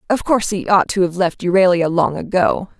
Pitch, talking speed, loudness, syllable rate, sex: 185 Hz, 215 wpm, -16 LUFS, 5.5 syllables/s, female